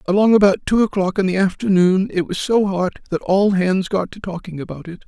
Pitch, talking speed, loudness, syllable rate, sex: 190 Hz, 225 wpm, -18 LUFS, 5.7 syllables/s, male